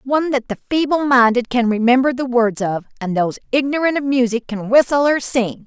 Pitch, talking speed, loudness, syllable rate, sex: 250 Hz, 200 wpm, -17 LUFS, 5.5 syllables/s, female